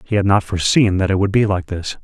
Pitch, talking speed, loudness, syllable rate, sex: 100 Hz, 295 wpm, -17 LUFS, 6.3 syllables/s, male